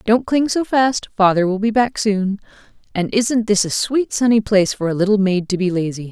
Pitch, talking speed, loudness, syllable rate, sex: 210 Hz, 225 wpm, -17 LUFS, 5.3 syllables/s, female